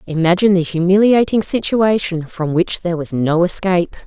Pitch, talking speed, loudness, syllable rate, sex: 180 Hz, 150 wpm, -16 LUFS, 5.5 syllables/s, female